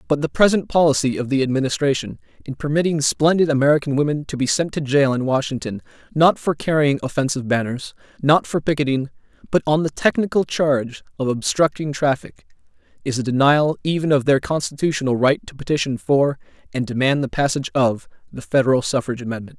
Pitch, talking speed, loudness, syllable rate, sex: 140 Hz, 170 wpm, -19 LUFS, 6.0 syllables/s, male